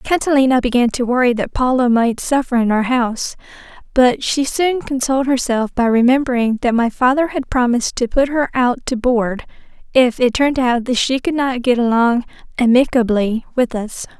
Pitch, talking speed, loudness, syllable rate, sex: 250 Hz, 180 wpm, -16 LUFS, 5.2 syllables/s, female